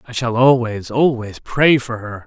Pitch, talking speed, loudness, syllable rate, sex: 120 Hz, 185 wpm, -17 LUFS, 4.3 syllables/s, male